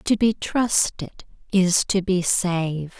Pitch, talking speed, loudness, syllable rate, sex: 185 Hz, 140 wpm, -21 LUFS, 3.4 syllables/s, female